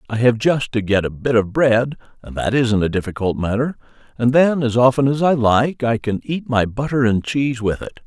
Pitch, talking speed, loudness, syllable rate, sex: 120 Hz, 230 wpm, -18 LUFS, 4.4 syllables/s, male